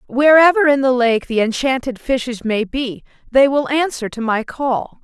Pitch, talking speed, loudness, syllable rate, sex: 255 Hz, 180 wpm, -16 LUFS, 4.6 syllables/s, female